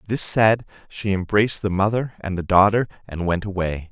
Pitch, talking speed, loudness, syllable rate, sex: 100 Hz, 185 wpm, -20 LUFS, 5.3 syllables/s, male